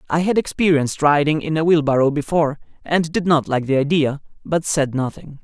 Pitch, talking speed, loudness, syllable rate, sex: 150 Hz, 190 wpm, -19 LUFS, 5.7 syllables/s, male